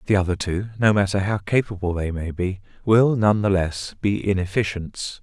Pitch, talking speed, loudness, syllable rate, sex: 100 Hz, 185 wpm, -22 LUFS, 5.0 syllables/s, male